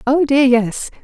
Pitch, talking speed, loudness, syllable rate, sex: 265 Hz, 175 wpm, -14 LUFS, 3.8 syllables/s, female